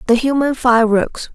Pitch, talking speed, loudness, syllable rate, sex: 245 Hz, 135 wpm, -15 LUFS, 5.1 syllables/s, female